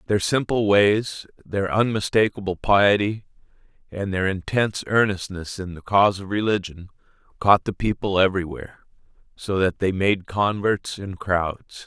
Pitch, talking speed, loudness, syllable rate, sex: 100 Hz, 130 wpm, -22 LUFS, 4.5 syllables/s, male